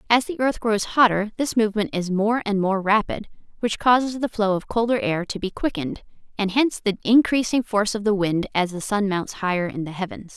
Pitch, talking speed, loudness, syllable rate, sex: 210 Hz, 220 wpm, -22 LUFS, 5.7 syllables/s, female